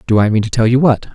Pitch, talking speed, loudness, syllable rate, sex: 115 Hz, 365 wpm, -13 LUFS, 6.9 syllables/s, male